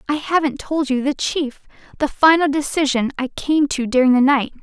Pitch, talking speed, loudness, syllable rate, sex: 280 Hz, 195 wpm, -18 LUFS, 5.1 syllables/s, female